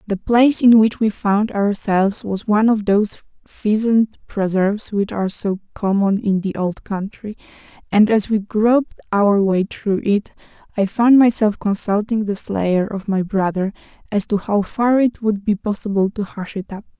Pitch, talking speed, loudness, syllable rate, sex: 205 Hz, 175 wpm, -18 LUFS, 4.6 syllables/s, female